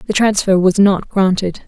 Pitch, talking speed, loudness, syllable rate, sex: 190 Hz, 180 wpm, -14 LUFS, 4.8 syllables/s, female